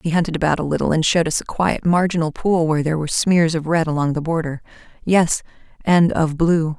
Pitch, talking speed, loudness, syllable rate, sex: 160 Hz, 220 wpm, -18 LUFS, 6.0 syllables/s, female